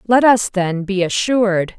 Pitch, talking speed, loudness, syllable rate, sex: 205 Hz, 170 wpm, -16 LUFS, 4.1 syllables/s, female